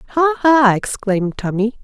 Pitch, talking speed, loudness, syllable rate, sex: 245 Hz, 130 wpm, -16 LUFS, 5.0 syllables/s, female